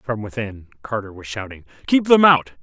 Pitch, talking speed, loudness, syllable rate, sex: 115 Hz, 185 wpm, -19 LUFS, 5.0 syllables/s, male